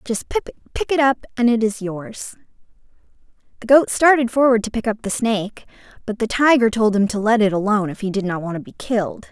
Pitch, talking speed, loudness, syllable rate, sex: 220 Hz, 220 wpm, -19 LUFS, 5.9 syllables/s, female